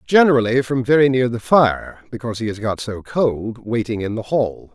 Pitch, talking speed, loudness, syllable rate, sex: 120 Hz, 200 wpm, -18 LUFS, 5.0 syllables/s, male